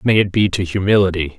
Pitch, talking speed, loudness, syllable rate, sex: 95 Hz, 215 wpm, -16 LUFS, 6.2 syllables/s, male